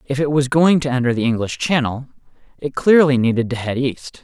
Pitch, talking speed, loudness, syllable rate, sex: 135 Hz, 215 wpm, -17 LUFS, 5.5 syllables/s, male